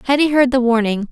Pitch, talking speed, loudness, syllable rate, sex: 250 Hz, 215 wpm, -15 LUFS, 6.5 syllables/s, female